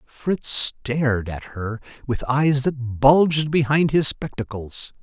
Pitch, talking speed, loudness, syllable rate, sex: 130 Hz, 130 wpm, -21 LUFS, 3.5 syllables/s, male